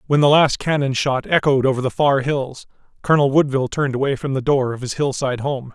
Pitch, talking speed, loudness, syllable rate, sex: 135 Hz, 220 wpm, -18 LUFS, 6.1 syllables/s, male